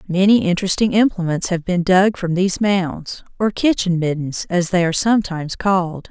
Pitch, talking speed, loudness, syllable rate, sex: 185 Hz, 165 wpm, -18 LUFS, 5.4 syllables/s, female